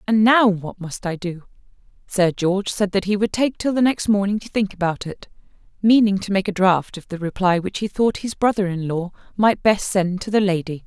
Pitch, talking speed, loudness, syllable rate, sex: 195 Hz, 225 wpm, -20 LUFS, 5.2 syllables/s, female